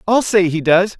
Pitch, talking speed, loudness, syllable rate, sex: 190 Hz, 240 wpm, -15 LUFS, 4.7 syllables/s, male